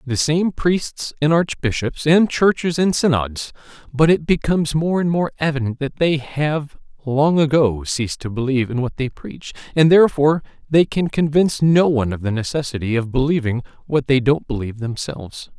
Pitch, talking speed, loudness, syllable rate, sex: 145 Hz, 175 wpm, -18 LUFS, 5.2 syllables/s, male